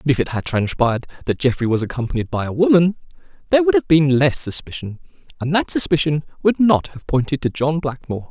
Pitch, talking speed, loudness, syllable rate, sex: 145 Hz, 200 wpm, -18 LUFS, 6.2 syllables/s, male